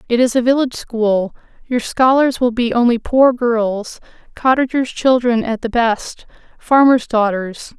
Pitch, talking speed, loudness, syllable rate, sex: 240 Hz, 130 wpm, -15 LUFS, 4.2 syllables/s, female